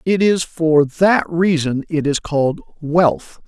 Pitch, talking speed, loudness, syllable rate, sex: 160 Hz, 155 wpm, -17 LUFS, 3.6 syllables/s, male